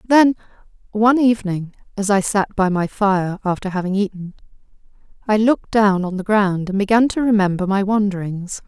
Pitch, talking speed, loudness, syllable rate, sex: 200 Hz, 165 wpm, -18 LUFS, 5.3 syllables/s, female